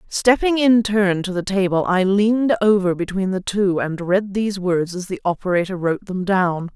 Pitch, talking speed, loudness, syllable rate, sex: 190 Hz, 195 wpm, -19 LUFS, 4.9 syllables/s, female